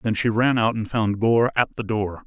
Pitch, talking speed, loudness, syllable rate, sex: 110 Hz, 265 wpm, -21 LUFS, 4.7 syllables/s, male